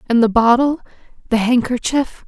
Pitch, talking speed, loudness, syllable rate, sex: 245 Hz, 105 wpm, -16 LUFS, 5.4 syllables/s, female